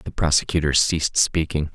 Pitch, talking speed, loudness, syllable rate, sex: 75 Hz, 140 wpm, -20 LUFS, 5.3 syllables/s, male